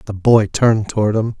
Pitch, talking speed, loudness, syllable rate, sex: 105 Hz, 215 wpm, -15 LUFS, 5.7 syllables/s, male